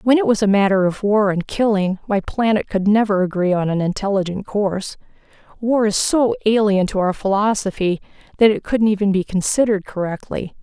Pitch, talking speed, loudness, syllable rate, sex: 200 Hz, 180 wpm, -18 LUFS, 5.7 syllables/s, female